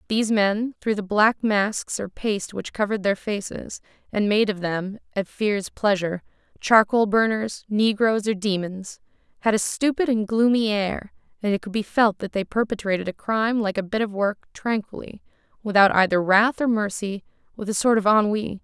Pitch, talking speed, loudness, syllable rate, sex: 210 Hz, 180 wpm, -22 LUFS, 5.0 syllables/s, female